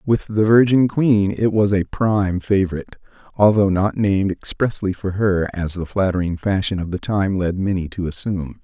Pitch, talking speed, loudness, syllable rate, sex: 100 Hz, 180 wpm, -19 LUFS, 5.2 syllables/s, male